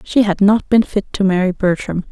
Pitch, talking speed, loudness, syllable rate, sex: 200 Hz, 225 wpm, -15 LUFS, 5.1 syllables/s, female